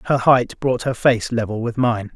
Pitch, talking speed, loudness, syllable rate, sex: 120 Hz, 220 wpm, -19 LUFS, 4.6 syllables/s, male